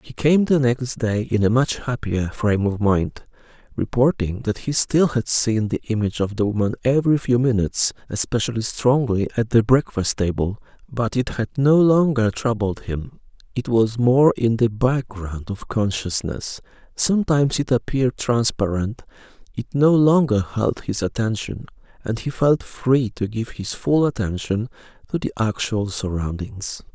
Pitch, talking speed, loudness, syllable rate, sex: 115 Hz, 155 wpm, -21 LUFS, 4.6 syllables/s, male